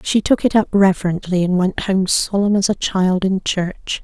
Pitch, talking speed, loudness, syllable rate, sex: 190 Hz, 210 wpm, -17 LUFS, 4.6 syllables/s, female